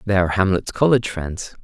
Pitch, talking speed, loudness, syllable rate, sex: 100 Hz, 185 wpm, -19 LUFS, 6.3 syllables/s, male